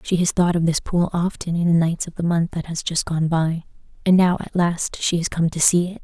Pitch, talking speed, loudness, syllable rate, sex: 170 Hz, 280 wpm, -20 LUFS, 5.3 syllables/s, female